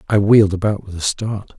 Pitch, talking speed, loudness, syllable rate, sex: 100 Hz, 230 wpm, -17 LUFS, 5.7 syllables/s, male